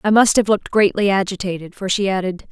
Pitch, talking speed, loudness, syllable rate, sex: 195 Hz, 215 wpm, -18 LUFS, 6.2 syllables/s, female